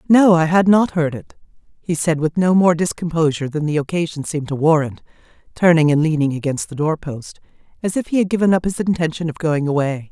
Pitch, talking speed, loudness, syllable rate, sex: 165 Hz, 210 wpm, -18 LUFS, 5.9 syllables/s, female